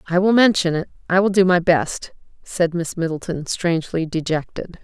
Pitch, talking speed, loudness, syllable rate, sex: 175 Hz, 175 wpm, -19 LUFS, 5.1 syllables/s, female